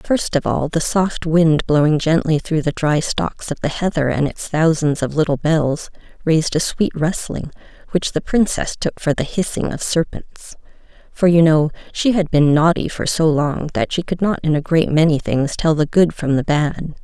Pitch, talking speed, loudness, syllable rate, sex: 160 Hz, 210 wpm, -18 LUFS, 4.6 syllables/s, female